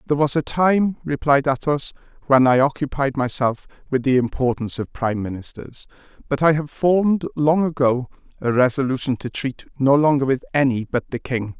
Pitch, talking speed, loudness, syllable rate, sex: 135 Hz, 170 wpm, -20 LUFS, 5.3 syllables/s, male